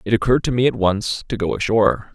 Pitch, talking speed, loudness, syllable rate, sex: 110 Hz, 250 wpm, -19 LUFS, 6.7 syllables/s, male